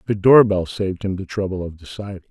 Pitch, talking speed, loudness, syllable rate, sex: 95 Hz, 235 wpm, -18 LUFS, 6.3 syllables/s, male